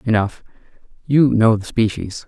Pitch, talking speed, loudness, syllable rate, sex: 115 Hz, 130 wpm, -17 LUFS, 4.3 syllables/s, male